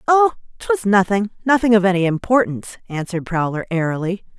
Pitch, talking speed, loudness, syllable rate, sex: 205 Hz, 125 wpm, -18 LUFS, 6.0 syllables/s, female